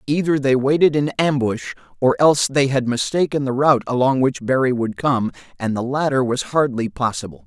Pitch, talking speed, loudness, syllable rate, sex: 130 Hz, 185 wpm, -19 LUFS, 5.4 syllables/s, male